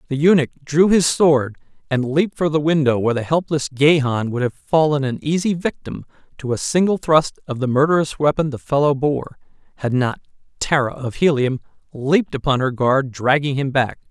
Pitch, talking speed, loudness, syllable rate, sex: 145 Hz, 185 wpm, -18 LUFS, 5.3 syllables/s, male